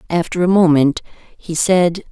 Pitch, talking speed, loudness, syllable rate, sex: 170 Hz, 140 wpm, -15 LUFS, 4.3 syllables/s, female